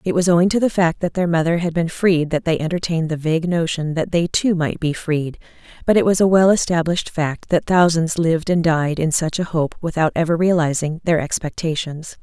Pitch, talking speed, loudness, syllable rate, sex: 165 Hz, 220 wpm, -18 LUFS, 5.6 syllables/s, female